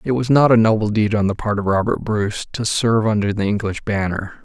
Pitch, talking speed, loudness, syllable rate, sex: 105 Hz, 245 wpm, -18 LUFS, 5.9 syllables/s, male